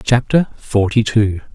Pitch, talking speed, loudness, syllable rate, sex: 110 Hz, 115 wpm, -16 LUFS, 3.9 syllables/s, male